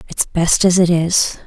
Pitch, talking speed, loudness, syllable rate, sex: 175 Hz, 205 wpm, -15 LUFS, 4.0 syllables/s, female